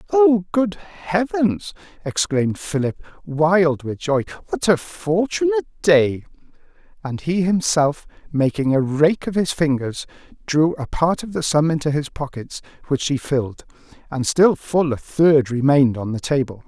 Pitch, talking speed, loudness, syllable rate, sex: 150 Hz, 150 wpm, -19 LUFS, 4.4 syllables/s, male